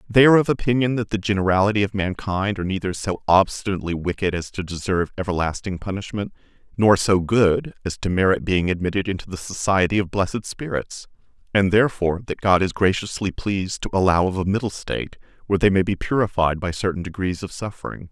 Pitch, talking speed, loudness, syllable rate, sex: 100 Hz, 185 wpm, -21 LUFS, 6.2 syllables/s, male